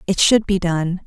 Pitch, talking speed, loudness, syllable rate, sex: 185 Hz, 225 wpm, -17 LUFS, 4.5 syllables/s, female